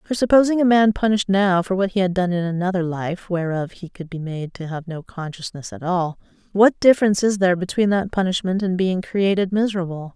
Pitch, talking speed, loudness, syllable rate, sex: 190 Hz, 215 wpm, -20 LUFS, 5.8 syllables/s, female